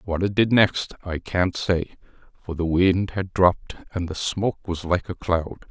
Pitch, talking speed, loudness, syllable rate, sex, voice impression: 90 Hz, 200 wpm, -23 LUFS, 4.5 syllables/s, male, masculine, middle-aged, tensed, slightly weak, muffled, slightly halting, cool, intellectual, calm, mature, friendly, reassuring, wild, kind